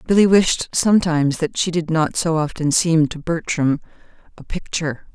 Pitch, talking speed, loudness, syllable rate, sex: 160 Hz, 150 wpm, -18 LUFS, 5.0 syllables/s, female